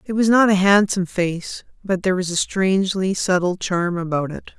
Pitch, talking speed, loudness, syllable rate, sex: 185 Hz, 195 wpm, -19 LUFS, 5.1 syllables/s, female